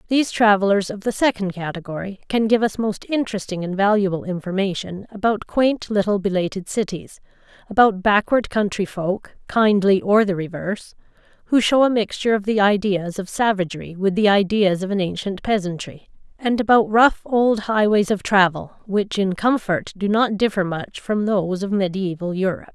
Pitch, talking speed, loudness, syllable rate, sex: 200 Hz, 165 wpm, -20 LUFS, 5.2 syllables/s, female